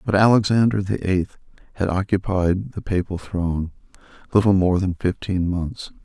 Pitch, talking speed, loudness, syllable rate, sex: 95 Hz, 140 wpm, -21 LUFS, 4.8 syllables/s, male